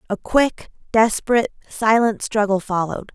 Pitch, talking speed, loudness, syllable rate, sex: 215 Hz, 115 wpm, -19 LUFS, 5.2 syllables/s, female